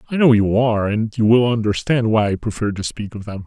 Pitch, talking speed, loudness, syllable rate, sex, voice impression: 110 Hz, 260 wpm, -18 LUFS, 5.7 syllables/s, male, very masculine, middle-aged, slightly muffled, sincere, slightly mature, kind